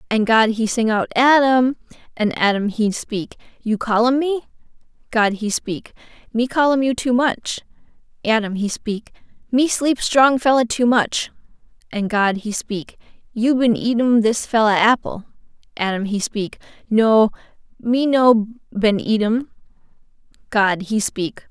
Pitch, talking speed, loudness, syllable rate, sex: 230 Hz, 155 wpm, -18 LUFS, 4.0 syllables/s, female